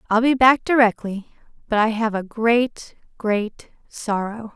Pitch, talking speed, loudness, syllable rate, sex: 225 Hz, 145 wpm, -20 LUFS, 3.9 syllables/s, female